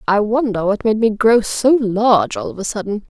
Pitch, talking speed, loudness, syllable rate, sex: 220 Hz, 225 wpm, -16 LUFS, 5.1 syllables/s, female